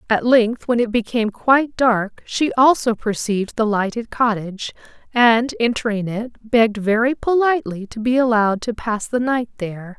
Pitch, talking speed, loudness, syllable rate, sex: 230 Hz, 160 wpm, -19 LUFS, 5.0 syllables/s, female